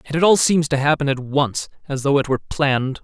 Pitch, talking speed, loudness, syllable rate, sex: 140 Hz, 255 wpm, -19 LUFS, 6.1 syllables/s, male